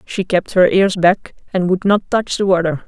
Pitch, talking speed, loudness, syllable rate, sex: 185 Hz, 230 wpm, -16 LUFS, 4.6 syllables/s, female